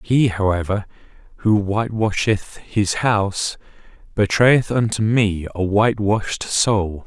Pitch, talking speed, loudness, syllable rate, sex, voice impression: 105 Hz, 100 wpm, -19 LUFS, 4.0 syllables/s, male, very masculine, very adult-like, middle-aged, thick, tensed, powerful, slightly bright, hard, clear, slightly fluent, slightly raspy, cool, very intellectual, refreshing, very sincere, calm, mature, friendly, very reassuring, unique, elegant, wild, slightly sweet, slightly lively, kind, slightly intense, slightly modest